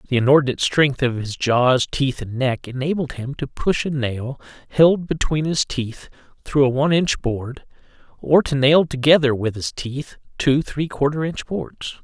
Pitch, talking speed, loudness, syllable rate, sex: 135 Hz, 175 wpm, -20 LUFS, 4.5 syllables/s, male